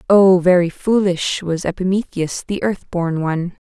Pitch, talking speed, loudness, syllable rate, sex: 180 Hz, 145 wpm, -17 LUFS, 4.6 syllables/s, female